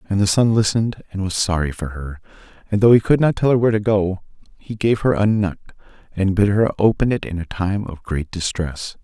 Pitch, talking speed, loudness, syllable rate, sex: 100 Hz, 230 wpm, -19 LUFS, 5.5 syllables/s, male